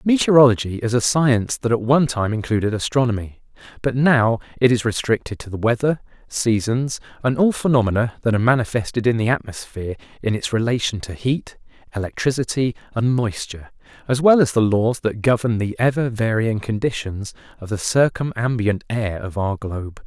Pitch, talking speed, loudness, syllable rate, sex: 115 Hz, 160 wpm, -20 LUFS, 5.5 syllables/s, male